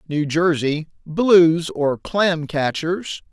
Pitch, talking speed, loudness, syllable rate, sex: 160 Hz, 110 wpm, -19 LUFS, 2.8 syllables/s, male